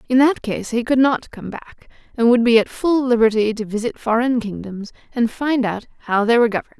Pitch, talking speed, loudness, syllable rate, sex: 235 Hz, 220 wpm, -18 LUFS, 5.5 syllables/s, female